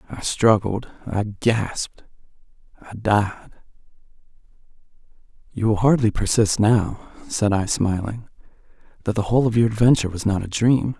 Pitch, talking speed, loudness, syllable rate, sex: 110 Hz, 120 wpm, -21 LUFS, 4.8 syllables/s, male